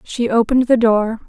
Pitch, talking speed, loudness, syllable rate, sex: 230 Hz, 190 wpm, -15 LUFS, 5.3 syllables/s, female